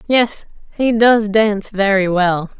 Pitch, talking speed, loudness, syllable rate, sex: 210 Hz, 140 wpm, -15 LUFS, 3.9 syllables/s, female